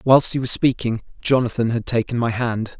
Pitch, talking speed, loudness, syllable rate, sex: 120 Hz, 195 wpm, -19 LUFS, 5.2 syllables/s, male